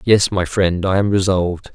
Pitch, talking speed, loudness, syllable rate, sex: 95 Hz, 205 wpm, -17 LUFS, 4.9 syllables/s, male